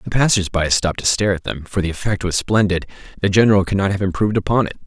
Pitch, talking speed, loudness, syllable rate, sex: 95 Hz, 245 wpm, -18 LUFS, 7.1 syllables/s, male